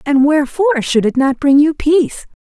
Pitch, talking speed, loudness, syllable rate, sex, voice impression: 290 Hz, 200 wpm, -13 LUFS, 5.5 syllables/s, female, very feminine, very adult-like, very middle-aged, slightly thin, very relaxed, weak, bright, very soft, slightly muffled, fluent, slightly raspy, cute, very intellectual, refreshing, very sincere, calm, very friendly, very reassuring, very unique, very elegant, slightly wild, very sweet, slightly lively, very kind, slightly intense, very modest, light